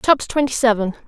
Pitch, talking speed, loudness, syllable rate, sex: 245 Hz, 170 wpm, -18 LUFS, 6.9 syllables/s, female